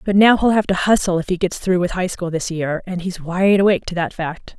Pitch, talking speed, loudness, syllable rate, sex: 180 Hz, 290 wpm, -18 LUFS, 5.6 syllables/s, female